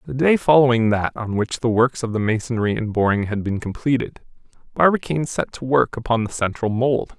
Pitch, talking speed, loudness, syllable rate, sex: 120 Hz, 200 wpm, -20 LUFS, 5.5 syllables/s, male